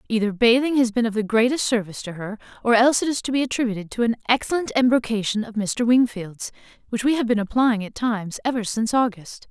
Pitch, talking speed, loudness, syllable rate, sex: 230 Hz, 215 wpm, -21 LUFS, 6.3 syllables/s, female